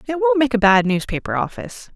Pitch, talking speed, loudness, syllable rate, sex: 215 Hz, 215 wpm, -18 LUFS, 6.2 syllables/s, female